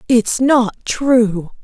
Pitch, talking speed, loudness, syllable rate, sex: 230 Hz, 110 wpm, -15 LUFS, 2.2 syllables/s, female